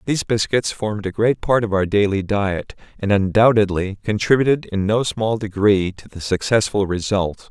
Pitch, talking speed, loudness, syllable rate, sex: 105 Hz, 170 wpm, -19 LUFS, 4.9 syllables/s, male